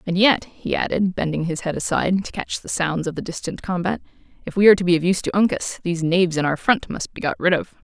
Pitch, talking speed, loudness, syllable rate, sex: 180 Hz, 265 wpm, -21 LUFS, 6.4 syllables/s, female